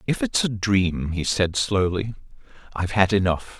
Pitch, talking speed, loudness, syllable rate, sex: 100 Hz, 165 wpm, -22 LUFS, 4.6 syllables/s, male